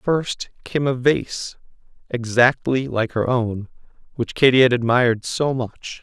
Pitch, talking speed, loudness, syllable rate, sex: 125 Hz, 140 wpm, -20 LUFS, 3.9 syllables/s, male